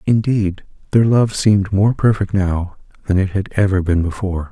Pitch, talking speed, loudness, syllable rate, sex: 100 Hz, 175 wpm, -17 LUFS, 5.0 syllables/s, male